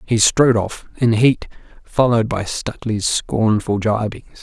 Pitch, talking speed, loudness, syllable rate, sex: 110 Hz, 135 wpm, -18 LUFS, 4.5 syllables/s, male